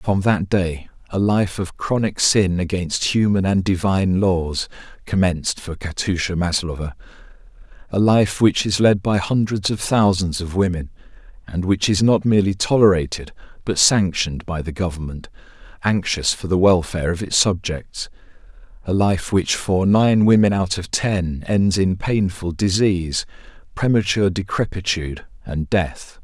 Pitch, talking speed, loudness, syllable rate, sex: 95 Hz, 145 wpm, -19 LUFS, 4.6 syllables/s, male